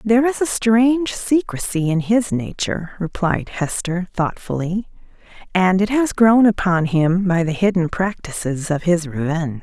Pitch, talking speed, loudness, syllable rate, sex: 190 Hz, 150 wpm, -19 LUFS, 4.5 syllables/s, female